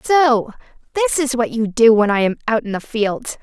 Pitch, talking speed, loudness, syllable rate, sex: 230 Hz, 230 wpm, -17 LUFS, 4.7 syllables/s, female